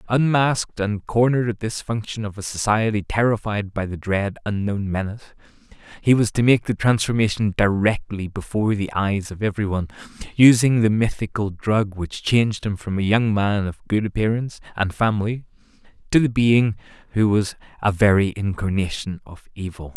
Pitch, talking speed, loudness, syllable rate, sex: 105 Hz, 160 wpm, -21 LUFS, 5.3 syllables/s, male